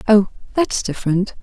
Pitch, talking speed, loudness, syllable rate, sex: 205 Hz, 125 wpm, -19 LUFS, 5.1 syllables/s, female